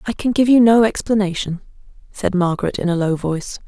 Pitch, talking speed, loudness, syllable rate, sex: 200 Hz, 195 wpm, -17 LUFS, 6.1 syllables/s, female